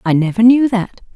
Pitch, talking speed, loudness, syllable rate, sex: 215 Hz, 210 wpm, -13 LUFS, 5.2 syllables/s, female